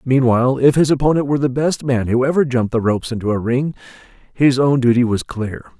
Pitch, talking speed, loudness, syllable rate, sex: 130 Hz, 215 wpm, -17 LUFS, 6.2 syllables/s, male